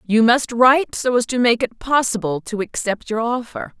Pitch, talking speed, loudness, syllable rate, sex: 230 Hz, 205 wpm, -18 LUFS, 4.9 syllables/s, female